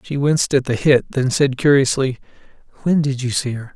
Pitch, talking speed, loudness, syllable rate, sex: 135 Hz, 210 wpm, -18 LUFS, 5.4 syllables/s, male